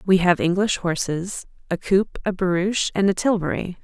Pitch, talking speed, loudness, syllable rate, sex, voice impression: 185 Hz, 170 wpm, -21 LUFS, 5.4 syllables/s, female, feminine, adult-like, slightly soft, calm, reassuring, kind